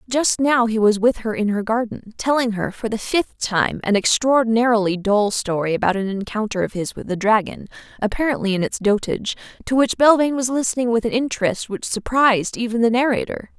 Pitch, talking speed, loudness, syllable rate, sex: 225 Hz, 195 wpm, -19 LUFS, 5.7 syllables/s, female